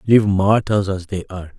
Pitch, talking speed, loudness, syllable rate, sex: 100 Hz, 190 wpm, -18 LUFS, 5.8 syllables/s, male